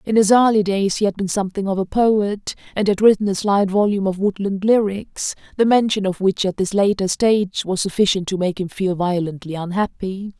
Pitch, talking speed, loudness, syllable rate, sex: 195 Hz, 210 wpm, -19 LUFS, 5.4 syllables/s, female